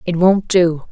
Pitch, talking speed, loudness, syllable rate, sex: 175 Hz, 200 wpm, -15 LUFS, 3.8 syllables/s, female